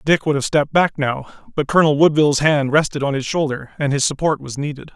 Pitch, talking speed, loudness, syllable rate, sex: 145 Hz, 230 wpm, -18 LUFS, 6.3 syllables/s, male